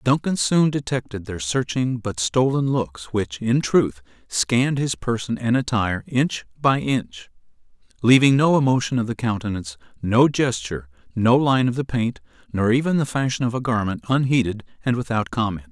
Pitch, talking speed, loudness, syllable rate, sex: 120 Hz, 165 wpm, -21 LUFS, 5.0 syllables/s, male